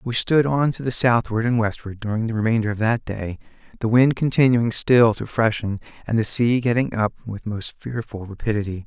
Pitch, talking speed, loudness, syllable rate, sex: 115 Hz, 195 wpm, -21 LUFS, 5.2 syllables/s, male